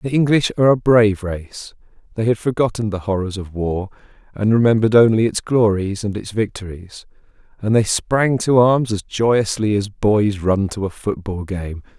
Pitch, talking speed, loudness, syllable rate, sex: 105 Hz, 175 wpm, -18 LUFS, 4.8 syllables/s, male